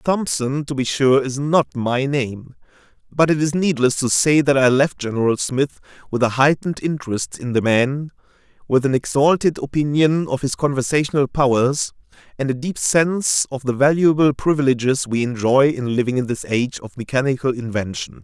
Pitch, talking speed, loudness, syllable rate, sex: 135 Hz, 170 wpm, -19 LUFS, 5.2 syllables/s, male